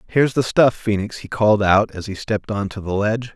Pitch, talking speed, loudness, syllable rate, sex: 105 Hz, 230 wpm, -19 LUFS, 6.0 syllables/s, male